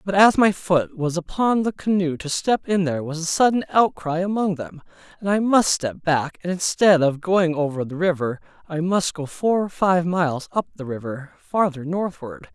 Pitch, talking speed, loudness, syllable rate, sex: 170 Hz, 200 wpm, -21 LUFS, 4.8 syllables/s, male